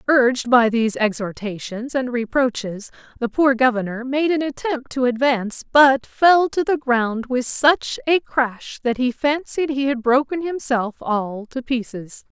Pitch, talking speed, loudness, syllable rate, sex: 255 Hz, 160 wpm, -20 LUFS, 4.2 syllables/s, female